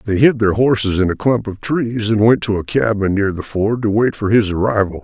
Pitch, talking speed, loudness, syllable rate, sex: 105 Hz, 260 wpm, -16 LUFS, 5.3 syllables/s, male